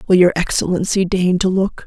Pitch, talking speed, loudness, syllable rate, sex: 185 Hz, 195 wpm, -16 LUFS, 5.3 syllables/s, female